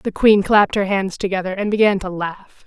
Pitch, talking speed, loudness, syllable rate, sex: 195 Hz, 225 wpm, -17 LUFS, 5.3 syllables/s, female